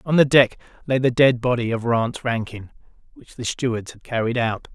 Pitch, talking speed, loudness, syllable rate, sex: 120 Hz, 200 wpm, -21 LUFS, 5.4 syllables/s, male